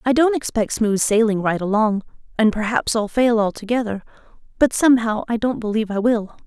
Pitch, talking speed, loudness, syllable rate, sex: 225 Hz, 175 wpm, -19 LUFS, 5.6 syllables/s, female